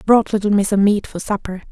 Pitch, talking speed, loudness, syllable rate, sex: 200 Hz, 210 wpm, -17 LUFS, 5.9 syllables/s, female